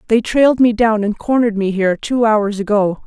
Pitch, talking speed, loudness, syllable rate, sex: 220 Hz, 215 wpm, -15 LUFS, 5.7 syllables/s, female